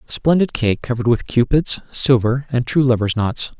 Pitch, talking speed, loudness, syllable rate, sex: 125 Hz, 165 wpm, -17 LUFS, 4.9 syllables/s, male